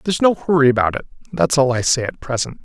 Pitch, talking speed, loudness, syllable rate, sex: 140 Hz, 250 wpm, -17 LUFS, 6.9 syllables/s, male